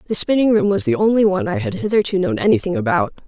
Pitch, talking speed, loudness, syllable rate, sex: 215 Hz, 240 wpm, -17 LUFS, 7.1 syllables/s, female